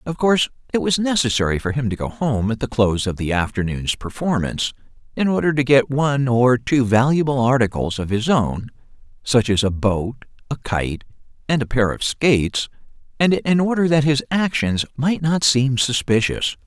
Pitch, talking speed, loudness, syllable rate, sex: 125 Hz, 175 wpm, -19 LUFS, 5.1 syllables/s, male